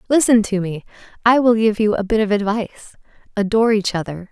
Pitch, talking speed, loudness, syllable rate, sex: 210 Hz, 195 wpm, -17 LUFS, 6.0 syllables/s, female